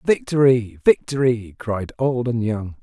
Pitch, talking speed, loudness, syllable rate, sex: 120 Hz, 130 wpm, -20 LUFS, 3.9 syllables/s, male